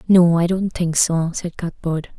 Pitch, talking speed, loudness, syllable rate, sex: 170 Hz, 190 wpm, -19 LUFS, 4.2 syllables/s, female